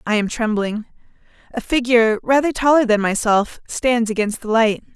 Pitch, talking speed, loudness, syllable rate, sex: 230 Hz, 155 wpm, -18 LUFS, 5.1 syllables/s, female